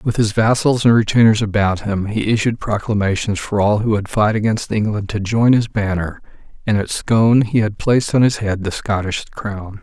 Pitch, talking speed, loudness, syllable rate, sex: 105 Hz, 200 wpm, -17 LUFS, 5.0 syllables/s, male